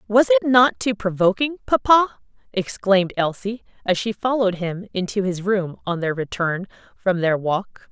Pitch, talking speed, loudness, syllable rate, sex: 200 Hz, 160 wpm, -21 LUFS, 4.6 syllables/s, female